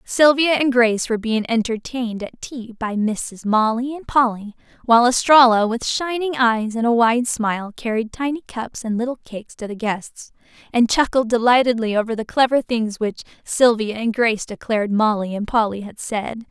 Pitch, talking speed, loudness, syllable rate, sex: 230 Hz, 175 wpm, -19 LUFS, 5.1 syllables/s, female